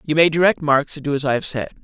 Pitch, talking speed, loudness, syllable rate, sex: 145 Hz, 330 wpm, -18 LUFS, 6.8 syllables/s, male